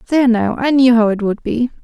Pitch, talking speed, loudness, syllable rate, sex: 240 Hz, 260 wpm, -14 LUFS, 5.9 syllables/s, female